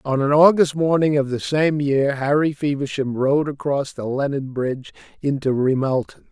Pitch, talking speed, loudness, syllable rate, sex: 140 Hz, 160 wpm, -20 LUFS, 4.7 syllables/s, male